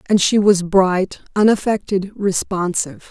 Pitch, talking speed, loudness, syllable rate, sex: 195 Hz, 115 wpm, -17 LUFS, 4.4 syllables/s, female